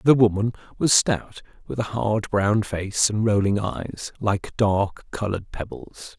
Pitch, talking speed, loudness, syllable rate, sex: 105 Hz, 155 wpm, -23 LUFS, 3.9 syllables/s, male